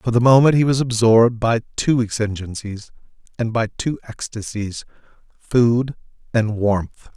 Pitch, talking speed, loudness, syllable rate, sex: 115 Hz, 125 wpm, -19 LUFS, 4.4 syllables/s, male